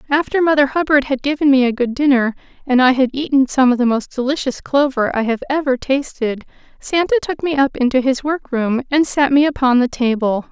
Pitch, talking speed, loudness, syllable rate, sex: 270 Hz, 210 wpm, -16 LUFS, 5.6 syllables/s, female